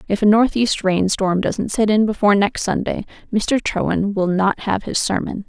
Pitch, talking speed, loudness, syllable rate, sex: 205 Hz, 185 wpm, -18 LUFS, 4.8 syllables/s, female